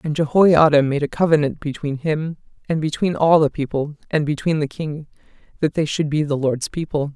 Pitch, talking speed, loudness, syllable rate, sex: 150 Hz, 195 wpm, -19 LUFS, 5.3 syllables/s, female